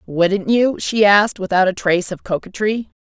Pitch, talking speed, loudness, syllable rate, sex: 200 Hz, 180 wpm, -17 LUFS, 5.1 syllables/s, female